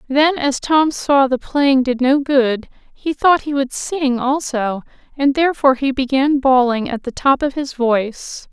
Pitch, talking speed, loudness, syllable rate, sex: 270 Hz, 185 wpm, -17 LUFS, 4.3 syllables/s, female